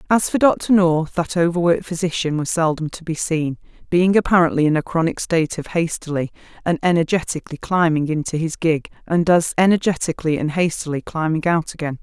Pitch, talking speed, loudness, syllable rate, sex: 165 Hz, 170 wpm, -19 LUFS, 5.8 syllables/s, female